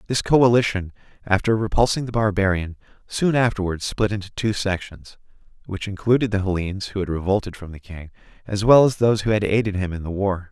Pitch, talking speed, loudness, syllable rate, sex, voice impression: 100 Hz, 190 wpm, -21 LUFS, 6.0 syllables/s, male, masculine, adult-like, cool, slightly refreshing, sincere, slightly calm, friendly